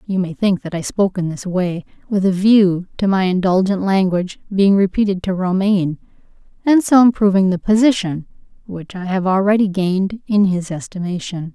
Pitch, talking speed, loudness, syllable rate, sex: 190 Hz, 170 wpm, -17 LUFS, 5.2 syllables/s, female